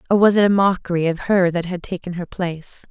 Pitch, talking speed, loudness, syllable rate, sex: 180 Hz, 250 wpm, -19 LUFS, 6.0 syllables/s, female